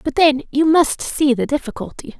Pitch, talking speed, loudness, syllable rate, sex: 285 Hz, 190 wpm, -17 LUFS, 5.1 syllables/s, female